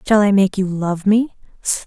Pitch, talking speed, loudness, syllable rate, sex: 200 Hz, 195 wpm, -17 LUFS, 4.8 syllables/s, female